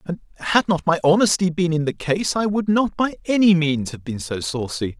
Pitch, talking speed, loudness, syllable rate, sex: 170 Hz, 230 wpm, -20 LUFS, 5.0 syllables/s, male